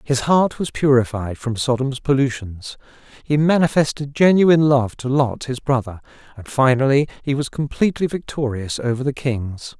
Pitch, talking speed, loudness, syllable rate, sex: 135 Hz, 145 wpm, -19 LUFS, 4.9 syllables/s, male